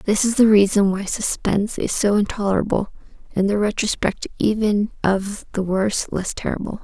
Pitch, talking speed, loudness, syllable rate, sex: 205 Hz, 160 wpm, -20 LUFS, 4.9 syllables/s, female